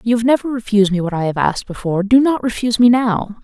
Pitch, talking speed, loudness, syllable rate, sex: 220 Hz, 260 wpm, -16 LUFS, 6.9 syllables/s, female